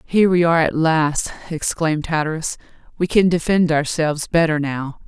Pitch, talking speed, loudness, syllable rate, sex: 160 Hz, 155 wpm, -19 LUFS, 5.3 syllables/s, female